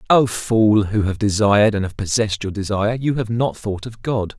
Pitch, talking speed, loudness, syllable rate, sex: 105 Hz, 220 wpm, -19 LUFS, 5.3 syllables/s, male